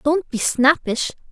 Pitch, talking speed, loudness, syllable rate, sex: 280 Hz, 135 wpm, -19 LUFS, 3.9 syllables/s, female